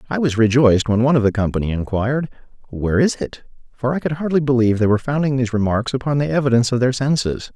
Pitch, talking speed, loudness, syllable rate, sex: 125 Hz, 220 wpm, -18 LUFS, 7.2 syllables/s, male